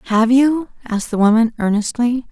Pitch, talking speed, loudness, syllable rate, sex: 235 Hz, 155 wpm, -16 LUFS, 5.4 syllables/s, female